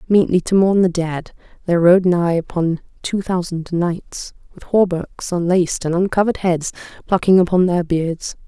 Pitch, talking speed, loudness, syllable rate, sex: 175 Hz, 155 wpm, -17 LUFS, 4.7 syllables/s, female